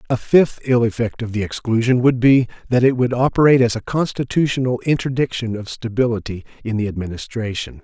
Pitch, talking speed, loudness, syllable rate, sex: 120 Hz, 170 wpm, -18 LUFS, 5.9 syllables/s, male